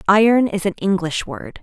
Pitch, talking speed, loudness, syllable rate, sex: 190 Hz, 185 wpm, -18 LUFS, 5.0 syllables/s, female